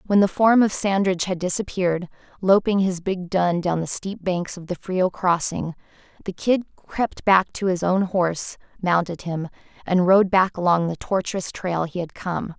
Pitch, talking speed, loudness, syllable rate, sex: 185 Hz, 185 wpm, -22 LUFS, 4.5 syllables/s, female